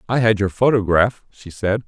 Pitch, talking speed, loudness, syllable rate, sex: 105 Hz, 190 wpm, -18 LUFS, 4.9 syllables/s, male